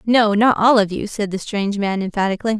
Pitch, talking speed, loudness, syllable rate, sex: 210 Hz, 230 wpm, -18 LUFS, 6.0 syllables/s, female